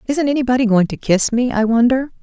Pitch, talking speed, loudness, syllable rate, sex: 240 Hz, 215 wpm, -16 LUFS, 6.1 syllables/s, female